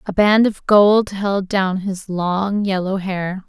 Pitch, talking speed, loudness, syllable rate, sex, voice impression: 195 Hz, 170 wpm, -17 LUFS, 3.3 syllables/s, female, very feminine, young, thin, very tensed, powerful, very bright, hard, very clear, fluent, slightly raspy, very cute, intellectual, very refreshing, sincere, very calm, very friendly, very reassuring, elegant, sweet, lively, kind, slightly modest, light